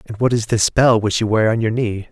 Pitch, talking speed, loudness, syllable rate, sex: 110 Hz, 310 wpm, -17 LUFS, 5.6 syllables/s, male